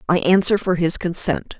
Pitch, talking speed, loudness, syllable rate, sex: 175 Hz, 190 wpm, -18 LUFS, 4.9 syllables/s, female